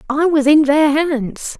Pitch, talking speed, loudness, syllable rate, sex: 290 Hz, 190 wpm, -14 LUFS, 3.6 syllables/s, female